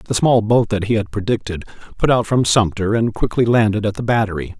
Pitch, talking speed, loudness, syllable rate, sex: 105 Hz, 220 wpm, -17 LUFS, 5.7 syllables/s, male